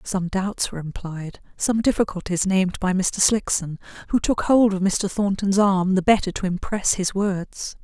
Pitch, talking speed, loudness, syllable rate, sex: 190 Hz, 175 wpm, -22 LUFS, 4.6 syllables/s, female